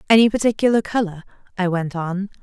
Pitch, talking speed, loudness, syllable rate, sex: 200 Hz, 150 wpm, -20 LUFS, 6.1 syllables/s, female